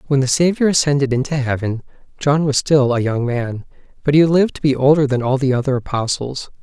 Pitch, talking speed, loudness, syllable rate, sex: 135 Hz, 210 wpm, -17 LUFS, 5.8 syllables/s, male